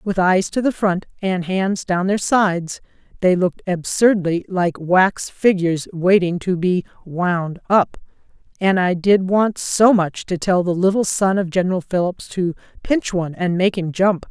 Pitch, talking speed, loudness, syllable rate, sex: 185 Hz, 175 wpm, -18 LUFS, 4.3 syllables/s, female